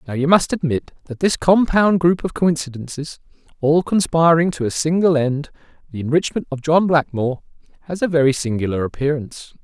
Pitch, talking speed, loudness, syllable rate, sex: 155 Hz, 150 wpm, -18 LUFS, 5.5 syllables/s, male